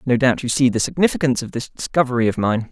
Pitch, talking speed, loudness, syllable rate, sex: 125 Hz, 245 wpm, -19 LUFS, 7.0 syllables/s, male